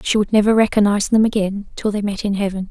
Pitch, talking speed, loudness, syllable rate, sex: 205 Hz, 245 wpm, -17 LUFS, 6.7 syllables/s, female